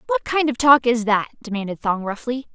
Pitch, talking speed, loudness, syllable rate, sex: 245 Hz, 210 wpm, -20 LUFS, 5.5 syllables/s, female